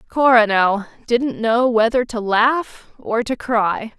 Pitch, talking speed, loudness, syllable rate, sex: 230 Hz, 135 wpm, -17 LUFS, 3.4 syllables/s, female